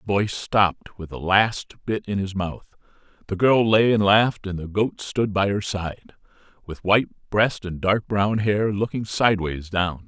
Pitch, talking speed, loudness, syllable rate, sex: 100 Hz, 190 wpm, -22 LUFS, 4.5 syllables/s, male